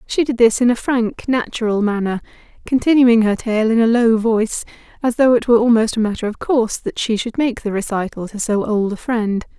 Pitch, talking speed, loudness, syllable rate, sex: 225 Hz, 220 wpm, -17 LUFS, 5.5 syllables/s, female